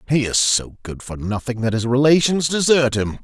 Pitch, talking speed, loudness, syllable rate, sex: 125 Hz, 205 wpm, -18 LUFS, 5.1 syllables/s, male